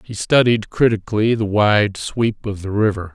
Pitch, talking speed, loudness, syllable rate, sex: 110 Hz, 170 wpm, -18 LUFS, 4.6 syllables/s, male